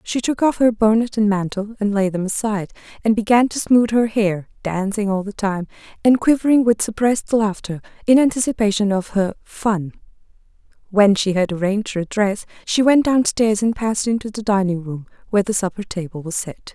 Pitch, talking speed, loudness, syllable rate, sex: 210 Hz, 190 wpm, -19 LUFS, 5.4 syllables/s, female